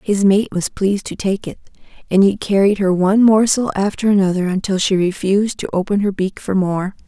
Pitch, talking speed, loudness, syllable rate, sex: 195 Hz, 205 wpm, -16 LUFS, 5.6 syllables/s, female